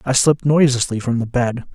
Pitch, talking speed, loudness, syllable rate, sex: 130 Hz, 205 wpm, -17 LUFS, 6.5 syllables/s, male